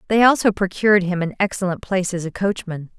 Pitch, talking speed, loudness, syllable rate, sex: 190 Hz, 200 wpm, -19 LUFS, 6.3 syllables/s, female